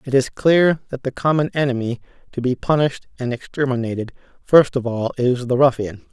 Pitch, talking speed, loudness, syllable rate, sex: 130 Hz, 175 wpm, -19 LUFS, 5.5 syllables/s, male